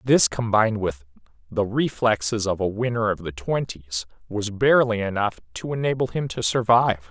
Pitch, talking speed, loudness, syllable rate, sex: 110 Hz, 160 wpm, -23 LUFS, 5.1 syllables/s, male